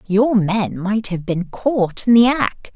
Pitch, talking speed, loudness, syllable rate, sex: 210 Hz, 195 wpm, -17 LUFS, 3.4 syllables/s, female